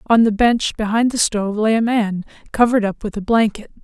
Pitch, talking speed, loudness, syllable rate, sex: 220 Hz, 220 wpm, -17 LUFS, 5.7 syllables/s, female